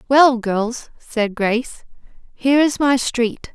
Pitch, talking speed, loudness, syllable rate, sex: 245 Hz, 135 wpm, -18 LUFS, 3.6 syllables/s, female